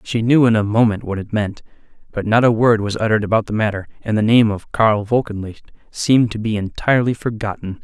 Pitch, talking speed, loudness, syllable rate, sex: 110 Hz, 215 wpm, -17 LUFS, 5.9 syllables/s, male